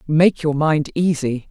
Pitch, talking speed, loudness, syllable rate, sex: 155 Hz, 160 wpm, -18 LUFS, 3.8 syllables/s, female